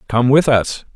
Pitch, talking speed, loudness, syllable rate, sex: 125 Hz, 190 wpm, -14 LUFS, 4.2 syllables/s, male